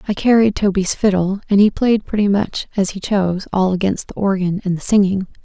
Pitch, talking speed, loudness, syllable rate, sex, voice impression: 195 Hz, 210 wpm, -17 LUFS, 5.5 syllables/s, female, feminine, adult-like, relaxed, weak, slightly dark, soft, calm, friendly, reassuring, elegant, kind, modest